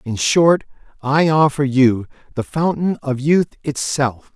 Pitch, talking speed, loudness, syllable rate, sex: 140 Hz, 140 wpm, -17 LUFS, 3.7 syllables/s, male